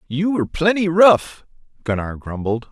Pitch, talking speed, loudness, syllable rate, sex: 150 Hz, 135 wpm, -18 LUFS, 4.6 syllables/s, male